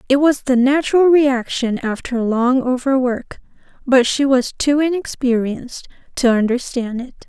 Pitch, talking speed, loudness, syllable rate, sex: 260 Hz, 130 wpm, -17 LUFS, 4.5 syllables/s, female